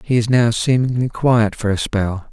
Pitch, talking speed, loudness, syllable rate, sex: 115 Hz, 205 wpm, -17 LUFS, 4.6 syllables/s, male